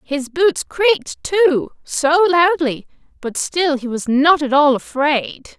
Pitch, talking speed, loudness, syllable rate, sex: 305 Hz, 150 wpm, -16 LUFS, 3.4 syllables/s, female